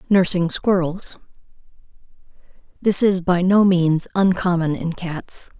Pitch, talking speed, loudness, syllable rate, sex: 180 Hz, 95 wpm, -19 LUFS, 3.9 syllables/s, female